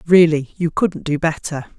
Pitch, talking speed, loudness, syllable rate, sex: 160 Hz, 170 wpm, -18 LUFS, 4.5 syllables/s, female